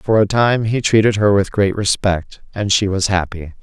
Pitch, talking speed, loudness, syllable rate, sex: 100 Hz, 215 wpm, -16 LUFS, 4.7 syllables/s, male